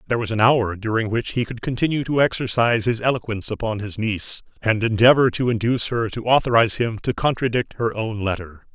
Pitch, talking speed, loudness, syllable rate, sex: 115 Hz, 200 wpm, -21 LUFS, 6.2 syllables/s, male